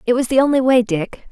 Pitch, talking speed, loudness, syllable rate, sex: 245 Hz, 275 wpm, -16 LUFS, 6.2 syllables/s, female